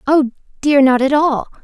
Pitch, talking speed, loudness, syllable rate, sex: 275 Hz, 185 wpm, -14 LUFS, 4.7 syllables/s, female